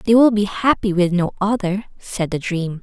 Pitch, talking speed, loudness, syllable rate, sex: 195 Hz, 210 wpm, -19 LUFS, 4.7 syllables/s, female